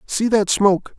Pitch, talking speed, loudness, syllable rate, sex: 205 Hz, 185 wpm, -17 LUFS, 4.8 syllables/s, male